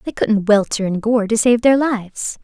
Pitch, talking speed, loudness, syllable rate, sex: 220 Hz, 220 wpm, -16 LUFS, 4.8 syllables/s, female